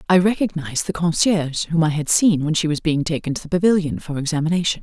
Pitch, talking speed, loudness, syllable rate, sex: 165 Hz, 225 wpm, -19 LUFS, 6.5 syllables/s, female